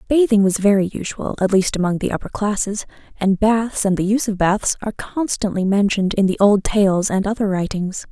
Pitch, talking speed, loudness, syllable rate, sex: 200 Hz, 200 wpm, -18 LUFS, 5.5 syllables/s, female